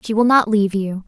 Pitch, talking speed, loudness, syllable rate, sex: 210 Hz, 280 wpm, -16 LUFS, 6.2 syllables/s, female